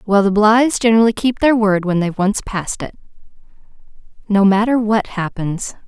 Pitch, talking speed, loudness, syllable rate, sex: 210 Hz, 165 wpm, -16 LUFS, 5.6 syllables/s, female